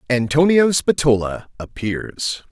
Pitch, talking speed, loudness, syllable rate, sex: 130 Hz, 70 wpm, -18 LUFS, 3.6 syllables/s, male